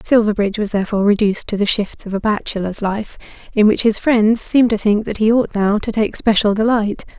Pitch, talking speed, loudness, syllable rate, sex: 215 Hz, 215 wpm, -16 LUFS, 5.9 syllables/s, female